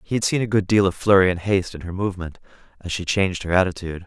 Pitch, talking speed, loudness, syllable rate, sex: 95 Hz, 265 wpm, -21 LUFS, 7.3 syllables/s, male